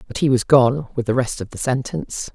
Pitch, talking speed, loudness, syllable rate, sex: 130 Hz, 255 wpm, -19 LUFS, 5.7 syllables/s, female